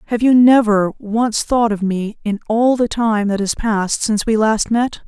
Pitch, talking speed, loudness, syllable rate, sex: 220 Hz, 215 wpm, -16 LUFS, 4.5 syllables/s, female